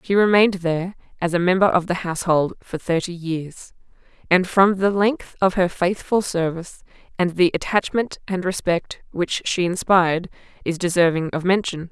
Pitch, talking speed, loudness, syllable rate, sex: 180 Hz, 160 wpm, -20 LUFS, 5.0 syllables/s, female